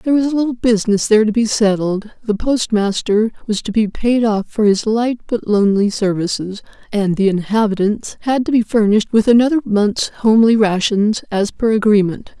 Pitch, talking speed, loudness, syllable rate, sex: 215 Hz, 175 wpm, -16 LUFS, 5.3 syllables/s, female